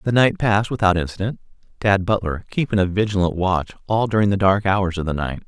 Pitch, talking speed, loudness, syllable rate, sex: 100 Hz, 210 wpm, -20 LUFS, 5.8 syllables/s, male